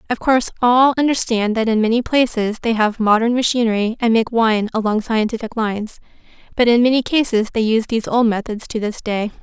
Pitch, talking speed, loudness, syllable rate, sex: 225 Hz, 190 wpm, -17 LUFS, 5.8 syllables/s, female